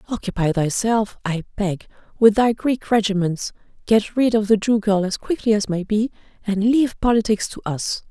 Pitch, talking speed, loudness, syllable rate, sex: 210 Hz, 180 wpm, -20 LUFS, 5.0 syllables/s, female